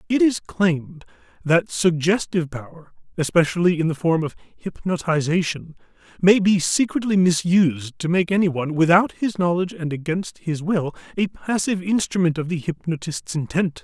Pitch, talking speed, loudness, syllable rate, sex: 175 Hz, 145 wpm, -21 LUFS, 5.1 syllables/s, male